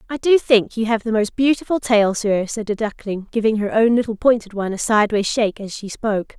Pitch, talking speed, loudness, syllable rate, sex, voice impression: 220 Hz, 235 wpm, -19 LUFS, 5.8 syllables/s, female, very feminine, slightly young, slightly adult-like, thin, slightly tensed, slightly powerful, bright, slightly hard, clear, very fluent, slightly raspy, slightly cute, intellectual, refreshing, slightly sincere, slightly calm, slightly friendly, slightly reassuring, very unique, slightly wild, lively, strict, intense, slightly sharp